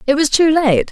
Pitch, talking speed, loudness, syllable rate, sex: 290 Hz, 265 wpm, -13 LUFS, 4.9 syllables/s, female